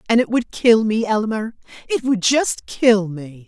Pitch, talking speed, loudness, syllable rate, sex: 220 Hz, 175 wpm, -18 LUFS, 4.1 syllables/s, female